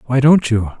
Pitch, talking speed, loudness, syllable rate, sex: 125 Hz, 225 wpm, -14 LUFS, 5.0 syllables/s, male